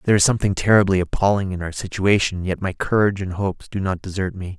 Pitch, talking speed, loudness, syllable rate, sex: 95 Hz, 220 wpm, -20 LUFS, 6.7 syllables/s, male